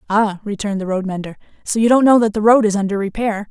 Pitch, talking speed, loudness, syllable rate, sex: 210 Hz, 255 wpm, -16 LUFS, 6.5 syllables/s, female